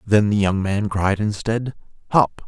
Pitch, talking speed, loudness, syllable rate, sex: 105 Hz, 170 wpm, -20 LUFS, 4.1 syllables/s, male